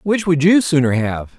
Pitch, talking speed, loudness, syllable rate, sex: 160 Hz, 215 wpm, -15 LUFS, 4.4 syllables/s, male